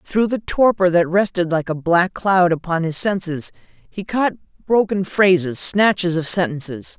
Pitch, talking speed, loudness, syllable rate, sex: 180 Hz, 165 wpm, -18 LUFS, 4.4 syllables/s, female